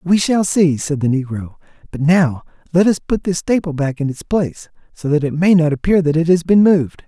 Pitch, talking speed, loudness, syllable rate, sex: 160 Hz, 235 wpm, -16 LUFS, 5.4 syllables/s, male